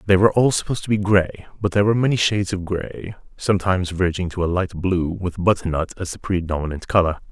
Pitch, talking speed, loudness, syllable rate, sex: 95 Hz, 215 wpm, -21 LUFS, 6.7 syllables/s, male